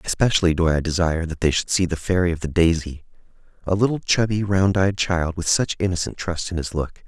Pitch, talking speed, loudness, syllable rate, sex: 90 Hz, 220 wpm, -21 LUFS, 5.9 syllables/s, male